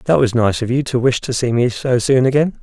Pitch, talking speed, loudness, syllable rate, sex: 125 Hz, 295 wpm, -16 LUFS, 5.4 syllables/s, male